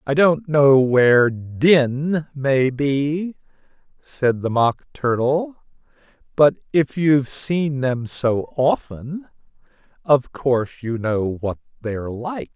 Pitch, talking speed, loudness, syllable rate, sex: 140 Hz, 120 wpm, -19 LUFS, 3.2 syllables/s, male